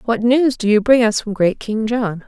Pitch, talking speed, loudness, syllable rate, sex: 225 Hz, 265 wpm, -16 LUFS, 4.7 syllables/s, female